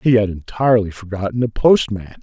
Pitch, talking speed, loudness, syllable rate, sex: 110 Hz, 160 wpm, -17 LUFS, 5.9 syllables/s, male